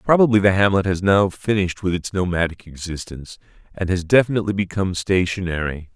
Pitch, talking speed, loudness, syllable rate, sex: 95 Hz, 150 wpm, -20 LUFS, 6.2 syllables/s, male